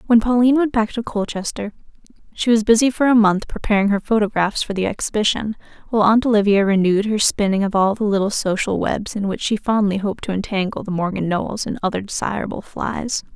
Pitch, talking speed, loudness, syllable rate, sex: 210 Hz, 200 wpm, -19 LUFS, 6.1 syllables/s, female